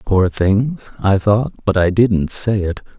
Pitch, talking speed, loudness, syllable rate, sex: 100 Hz, 180 wpm, -16 LUFS, 3.6 syllables/s, male